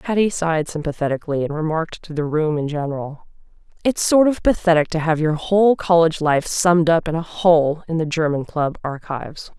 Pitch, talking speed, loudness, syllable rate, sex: 160 Hz, 190 wpm, -19 LUFS, 5.6 syllables/s, female